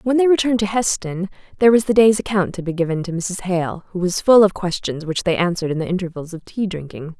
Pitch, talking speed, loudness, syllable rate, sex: 190 Hz, 250 wpm, -19 LUFS, 6.3 syllables/s, female